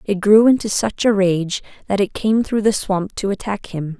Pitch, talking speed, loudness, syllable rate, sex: 200 Hz, 225 wpm, -18 LUFS, 4.7 syllables/s, female